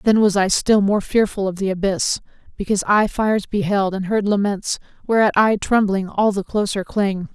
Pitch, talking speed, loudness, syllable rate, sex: 200 Hz, 190 wpm, -19 LUFS, 5.1 syllables/s, female